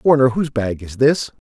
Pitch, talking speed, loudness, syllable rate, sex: 130 Hz, 205 wpm, -18 LUFS, 5.7 syllables/s, male